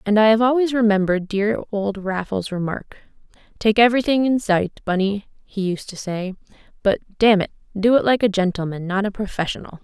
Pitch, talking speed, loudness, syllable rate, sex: 205 Hz, 175 wpm, -20 LUFS, 5.6 syllables/s, female